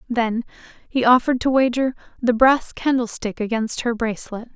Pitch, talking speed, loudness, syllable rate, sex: 240 Hz, 145 wpm, -20 LUFS, 5.2 syllables/s, female